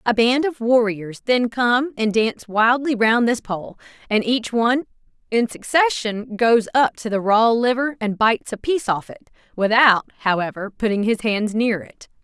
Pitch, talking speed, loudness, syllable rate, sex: 230 Hz, 175 wpm, -19 LUFS, 4.7 syllables/s, female